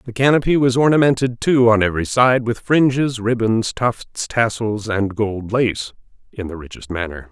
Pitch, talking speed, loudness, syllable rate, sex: 115 Hz, 165 wpm, -18 LUFS, 4.7 syllables/s, male